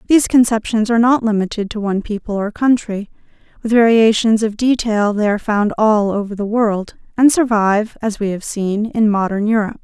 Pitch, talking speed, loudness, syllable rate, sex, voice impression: 215 Hz, 185 wpm, -16 LUFS, 5.5 syllables/s, female, very feminine, middle-aged, thin, tensed, slightly powerful, slightly dark, slightly soft, clear, slightly fluent, slightly raspy, slightly cool, intellectual, refreshing, sincere, calm, slightly friendly, reassuring, unique, elegant, wild, slightly sweet, lively, slightly kind, slightly intense, sharp, slightly modest